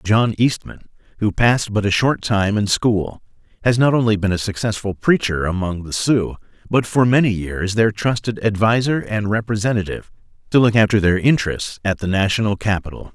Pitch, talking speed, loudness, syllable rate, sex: 105 Hz, 175 wpm, -18 LUFS, 5.3 syllables/s, male